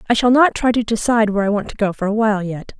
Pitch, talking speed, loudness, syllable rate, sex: 215 Hz, 320 wpm, -17 LUFS, 7.3 syllables/s, female